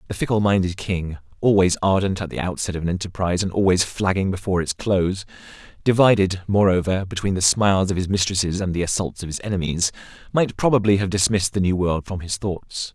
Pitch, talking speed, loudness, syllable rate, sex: 95 Hz, 195 wpm, -21 LUFS, 6.1 syllables/s, male